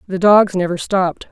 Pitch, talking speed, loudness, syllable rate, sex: 185 Hz, 180 wpm, -15 LUFS, 5.1 syllables/s, female